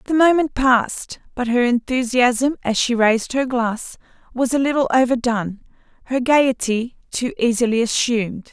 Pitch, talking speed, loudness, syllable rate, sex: 245 Hz, 140 wpm, -19 LUFS, 4.8 syllables/s, female